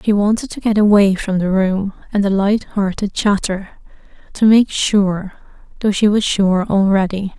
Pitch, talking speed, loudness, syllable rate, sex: 200 Hz, 165 wpm, -16 LUFS, 4.5 syllables/s, female